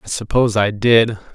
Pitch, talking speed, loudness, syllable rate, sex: 110 Hz, 180 wpm, -16 LUFS, 5.4 syllables/s, male